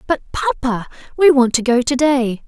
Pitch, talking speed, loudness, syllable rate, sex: 265 Hz, 195 wpm, -16 LUFS, 4.7 syllables/s, female